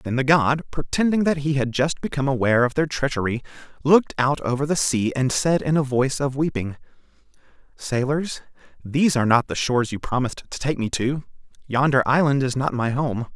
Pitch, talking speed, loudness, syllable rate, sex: 135 Hz, 195 wpm, -22 LUFS, 5.8 syllables/s, male